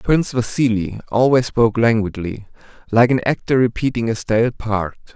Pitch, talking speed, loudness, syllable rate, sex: 115 Hz, 140 wpm, -18 LUFS, 5.2 syllables/s, male